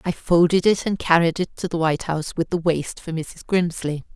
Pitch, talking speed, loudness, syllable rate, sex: 170 Hz, 230 wpm, -21 LUFS, 5.3 syllables/s, female